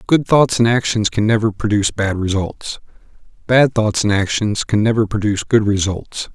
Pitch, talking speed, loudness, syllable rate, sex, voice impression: 110 Hz, 170 wpm, -16 LUFS, 5.1 syllables/s, male, masculine, adult-like, tensed, clear, slightly fluent, slightly raspy, cute, sincere, calm, slightly mature, friendly, reassuring, wild, lively, kind